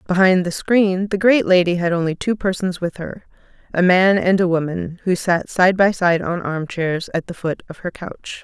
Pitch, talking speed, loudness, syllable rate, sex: 180 Hz, 220 wpm, -18 LUFS, 4.7 syllables/s, female